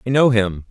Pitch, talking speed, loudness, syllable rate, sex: 115 Hz, 255 wpm, -16 LUFS, 5.5 syllables/s, male